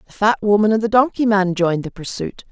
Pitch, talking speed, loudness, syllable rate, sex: 205 Hz, 240 wpm, -17 LUFS, 6.1 syllables/s, female